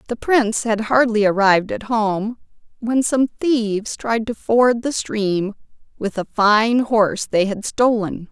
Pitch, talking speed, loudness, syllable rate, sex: 220 Hz, 160 wpm, -18 LUFS, 4.0 syllables/s, female